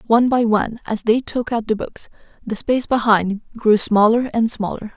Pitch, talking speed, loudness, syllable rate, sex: 225 Hz, 195 wpm, -18 LUFS, 5.2 syllables/s, female